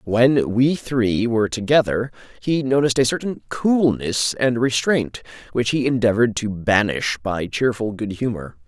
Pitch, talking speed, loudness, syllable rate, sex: 120 Hz, 145 wpm, -20 LUFS, 4.5 syllables/s, male